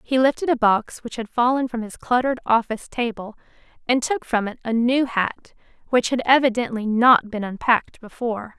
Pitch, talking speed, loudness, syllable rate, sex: 235 Hz, 180 wpm, -21 LUFS, 5.4 syllables/s, female